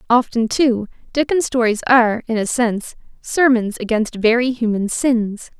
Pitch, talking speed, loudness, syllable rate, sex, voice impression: 235 Hz, 140 wpm, -17 LUFS, 4.6 syllables/s, female, feminine, slightly adult-like, slightly clear, slightly cute, slightly refreshing, sincere, friendly